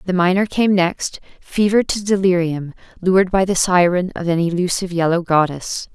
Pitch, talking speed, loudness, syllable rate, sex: 180 Hz, 160 wpm, -17 LUFS, 5.3 syllables/s, female